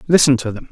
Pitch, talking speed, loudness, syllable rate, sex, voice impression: 135 Hz, 250 wpm, -15 LUFS, 7.3 syllables/s, male, masculine, slightly old, slightly thick, slightly intellectual, calm, friendly, slightly elegant